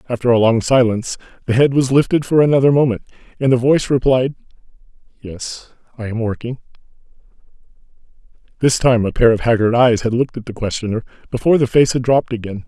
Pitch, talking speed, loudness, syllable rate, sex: 125 Hz, 170 wpm, -16 LUFS, 6.5 syllables/s, male